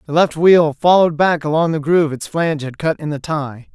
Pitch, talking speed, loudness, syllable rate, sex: 155 Hz, 240 wpm, -16 LUFS, 5.6 syllables/s, male